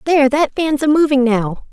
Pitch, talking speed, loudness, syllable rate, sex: 275 Hz, 210 wpm, -15 LUFS, 5.1 syllables/s, female